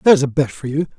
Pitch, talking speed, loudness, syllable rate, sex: 145 Hz, 305 wpm, -18 LUFS, 7.5 syllables/s, male